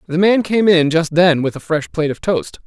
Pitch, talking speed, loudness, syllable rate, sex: 160 Hz, 270 wpm, -15 LUFS, 5.2 syllables/s, male